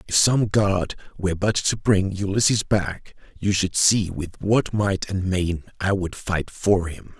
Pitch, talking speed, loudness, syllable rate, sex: 95 Hz, 185 wpm, -22 LUFS, 3.9 syllables/s, male